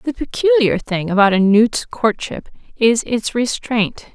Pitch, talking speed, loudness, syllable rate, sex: 225 Hz, 145 wpm, -16 LUFS, 4.0 syllables/s, female